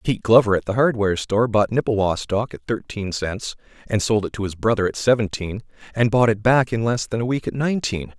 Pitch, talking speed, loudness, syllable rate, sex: 110 Hz, 225 wpm, -21 LUFS, 5.9 syllables/s, male